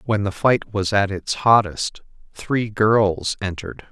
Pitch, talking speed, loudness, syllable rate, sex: 100 Hz, 155 wpm, -20 LUFS, 3.8 syllables/s, male